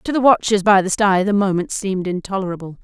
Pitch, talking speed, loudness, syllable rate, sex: 195 Hz, 210 wpm, -17 LUFS, 6.3 syllables/s, female